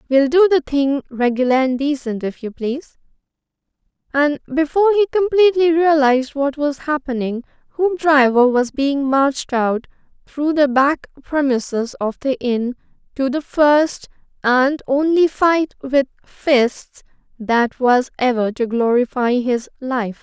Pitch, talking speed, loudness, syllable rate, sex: 275 Hz, 135 wpm, -17 LUFS, 4.2 syllables/s, female